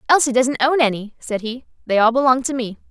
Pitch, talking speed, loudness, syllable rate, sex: 250 Hz, 225 wpm, -18 LUFS, 6.0 syllables/s, female